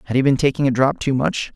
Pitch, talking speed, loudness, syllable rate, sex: 130 Hz, 310 wpm, -18 LUFS, 6.6 syllables/s, male